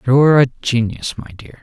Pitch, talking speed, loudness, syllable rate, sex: 125 Hz, 185 wpm, -15 LUFS, 4.8 syllables/s, male